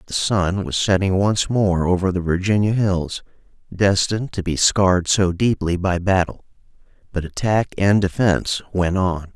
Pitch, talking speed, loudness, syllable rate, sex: 95 Hz, 155 wpm, -19 LUFS, 4.6 syllables/s, male